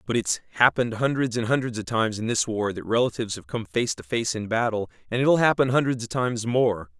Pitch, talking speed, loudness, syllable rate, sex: 115 Hz, 230 wpm, -24 LUFS, 6.1 syllables/s, male